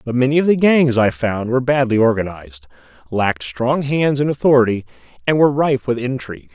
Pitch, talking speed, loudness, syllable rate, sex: 125 Hz, 185 wpm, -17 LUFS, 5.9 syllables/s, male